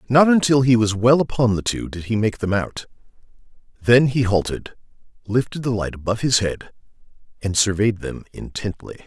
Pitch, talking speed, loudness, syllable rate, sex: 115 Hz, 170 wpm, -20 LUFS, 5.4 syllables/s, male